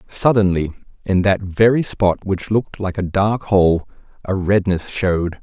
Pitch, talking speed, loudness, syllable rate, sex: 95 Hz, 155 wpm, -18 LUFS, 4.4 syllables/s, male